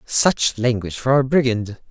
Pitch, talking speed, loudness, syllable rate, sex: 120 Hz, 155 wpm, -19 LUFS, 4.6 syllables/s, male